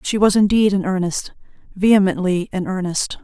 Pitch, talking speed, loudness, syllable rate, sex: 195 Hz, 130 wpm, -18 LUFS, 5.2 syllables/s, female